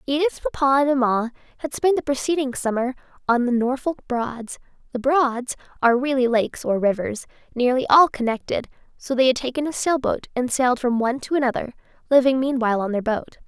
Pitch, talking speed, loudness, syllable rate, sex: 260 Hz, 180 wpm, -21 LUFS, 5.9 syllables/s, female